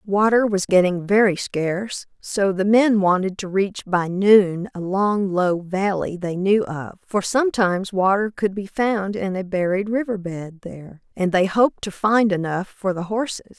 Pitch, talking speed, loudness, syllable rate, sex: 195 Hz, 180 wpm, -20 LUFS, 4.4 syllables/s, female